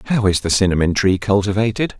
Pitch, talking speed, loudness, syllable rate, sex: 100 Hz, 180 wpm, -17 LUFS, 6.2 syllables/s, male